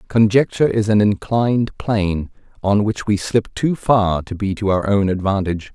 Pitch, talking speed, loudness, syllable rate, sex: 105 Hz, 175 wpm, -18 LUFS, 5.0 syllables/s, male